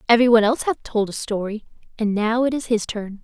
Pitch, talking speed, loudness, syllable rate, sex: 225 Hz, 240 wpm, -20 LUFS, 6.6 syllables/s, female